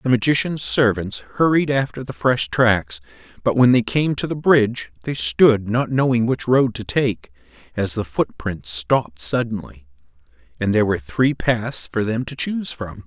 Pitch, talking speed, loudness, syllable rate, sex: 120 Hz, 175 wpm, -20 LUFS, 4.7 syllables/s, male